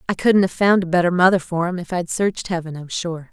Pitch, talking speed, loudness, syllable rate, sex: 175 Hz, 270 wpm, -19 LUFS, 6.0 syllables/s, female